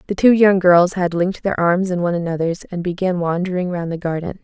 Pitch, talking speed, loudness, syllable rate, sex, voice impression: 180 Hz, 230 wpm, -18 LUFS, 5.9 syllables/s, female, feminine, adult-like, slightly soft, calm